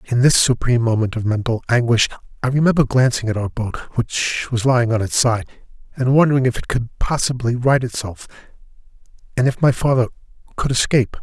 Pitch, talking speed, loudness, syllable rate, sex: 120 Hz, 175 wpm, -18 LUFS, 5.7 syllables/s, male